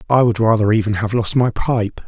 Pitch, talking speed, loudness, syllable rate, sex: 110 Hz, 230 wpm, -17 LUFS, 5.4 syllables/s, male